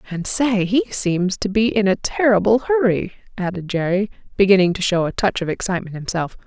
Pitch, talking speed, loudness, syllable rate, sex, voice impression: 200 Hz, 185 wpm, -19 LUFS, 5.6 syllables/s, female, very feminine, very adult-like, middle-aged, thin, slightly relaxed, slightly weak, bright, hard, very clear, fluent, very cool, very intellectual, refreshing, sincere, very calm, slightly friendly, very elegant, lively, slightly kind, slightly modest